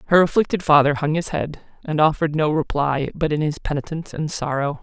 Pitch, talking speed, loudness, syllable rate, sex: 155 Hz, 200 wpm, -20 LUFS, 5.9 syllables/s, female